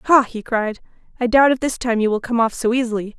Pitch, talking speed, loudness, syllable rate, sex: 235 Hz, 265 wpm, -19 LUFS, 5.9 syllables/s, female